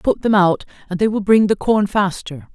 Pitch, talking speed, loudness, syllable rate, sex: 200 Hz, 235 wpm, -17 LUFS, 4.8 syllables/s, female